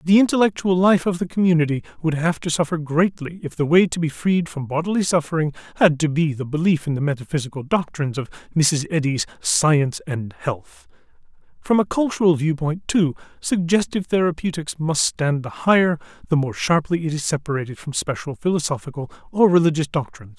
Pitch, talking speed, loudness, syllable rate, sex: 160 Hz, 170 wpm, -21 LUFS, 5.7 syllables/s, male